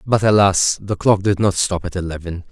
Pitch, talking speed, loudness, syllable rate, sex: 95 Hz, 215 wpm, -17 LUFS, 5.1 syllables/s, male